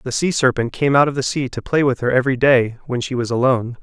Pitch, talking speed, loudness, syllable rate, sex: 130 Hz, 280 wpm, -18 LUFS, 6.3 syllables/s, male